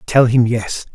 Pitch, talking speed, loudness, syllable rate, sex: 120 Hz, 190 wpm, -15 LUFS, 4.0 syllables/s, male